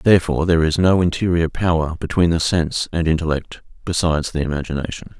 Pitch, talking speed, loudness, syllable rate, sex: 80 Hz, 160 wpm, -19 LUFS, 6.4 syllables/s, male